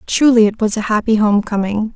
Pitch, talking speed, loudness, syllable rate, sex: 215 Hz, 215 wpm, -15 LUFS, 5.5 syllables/s, female